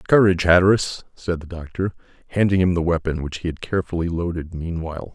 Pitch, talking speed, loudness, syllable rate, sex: 85 Hz, 175 wpm, -21 LUFS, 6.3 syllables/s, male